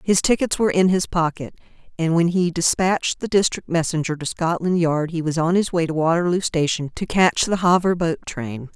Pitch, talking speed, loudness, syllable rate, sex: 170 Hz, 205 wpm, -20 LUFS, 5.3 syllables/s, female